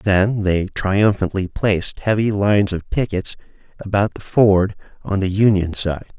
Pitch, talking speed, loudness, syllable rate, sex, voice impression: 100 Hz, 145 wpm, -18 LUFS, 4.3 syllables/s, male, masculine, adult-like, thick, powerful, intellectual, sincere, calm, friendly, reassuring, slightly wild, kind